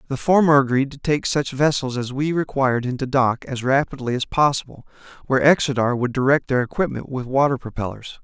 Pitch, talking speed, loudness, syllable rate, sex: 135 Hz, 180 wpm, -20 LUFS, 5.7 syllables/s, male